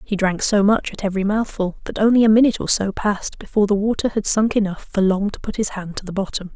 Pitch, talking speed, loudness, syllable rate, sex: 205 Hz, 265 wpm, -19 LUFS, 6.5 syllables/s, female